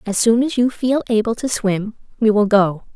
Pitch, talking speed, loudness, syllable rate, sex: 220 Hz, 225 wpm, -17 LUFS, 4.9 syllables/s, female